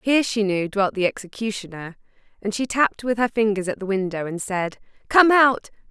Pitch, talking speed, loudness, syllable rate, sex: 210 Hz, 195 wpm, -21 LUFS, 5.6 syllables/s, female